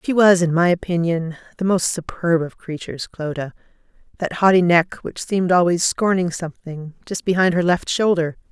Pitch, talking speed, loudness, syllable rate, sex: 175 Hz, 160 wpm, -19 LUFS, 5.2 syllables/s, female